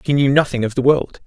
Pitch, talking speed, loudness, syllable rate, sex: 135 Hz, 285 wpm, -17 LUFS, 6.4 syllables/s, male